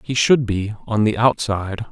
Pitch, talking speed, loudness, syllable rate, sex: 110 Hz, 190 wpm, -19 LUFS, 4.8 syllables/s, male